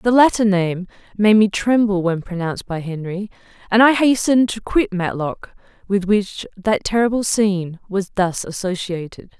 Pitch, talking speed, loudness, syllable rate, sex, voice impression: 200 Hz, 155 wpm, -18 LUFS, 4.8 syllables/s, female, very feminine, very adult-like, middle-aged, slightly thin, slightly tensed, powerful, slightly bright, slightly soft, clear, fluent, slightly cute, cool, intellectual, refreshing, sincere, very calm, friendly, very reassuring, very unique, very elegant, wild, very sweet, very kind, very modest